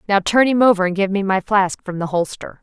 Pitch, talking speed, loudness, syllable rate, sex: 195 Hz, 275 wpm, -17 LUFS, 5.7 syllables/s, female